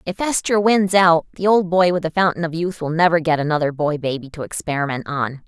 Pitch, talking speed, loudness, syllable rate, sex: 165 Hz, 230 wpm, -18 LUFS, 5.8 syllables/s, female